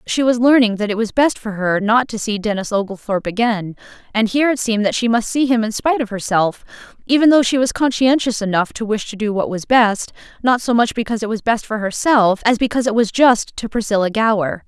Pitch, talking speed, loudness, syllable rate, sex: 225 Hz, 235 wpm, -17 LUFS, 5.9 syllables/s, female